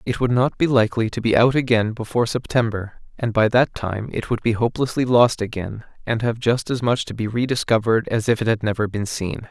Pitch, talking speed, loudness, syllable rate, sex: 115 Hz, 225 wpm, -20 LUFS, 5.8 syllables/s, male